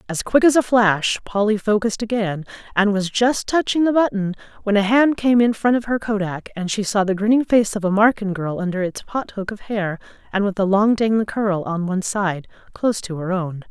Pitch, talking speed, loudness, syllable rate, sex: 205 Hz, 230 wpm, -19 LUFS, 5.3 syllables/s, female